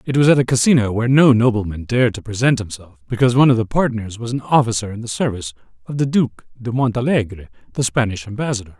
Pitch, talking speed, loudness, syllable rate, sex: 115 Hz, 210 wpm, -17 LUFS, 6.9 syllables/s, male